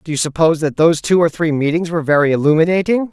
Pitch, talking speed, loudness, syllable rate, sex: 160 Hz, 230 wpm, -15 LUFS, 7.3 syllables/s, male